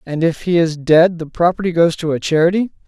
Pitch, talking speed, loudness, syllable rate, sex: 165 Hz, 230 wpm, -16 LUFS, 5.8 syllables/s, male